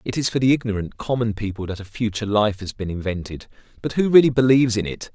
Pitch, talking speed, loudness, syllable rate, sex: 110 Hz, 235 wpm, -21 LUFS, 6.6 syllables/s, male